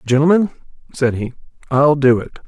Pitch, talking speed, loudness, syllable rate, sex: 140 Hz, 145 wpm, -16 LUFS, 5.6 syllables/s, male